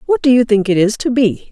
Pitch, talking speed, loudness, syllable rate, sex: 235 Hz, 315 wpm, -13 LUFS, 5.8 syllables/s, female